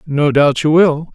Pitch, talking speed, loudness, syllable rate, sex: 150 Hz, 210 wpm, -13 LUFS, 3.9 syllables/s, male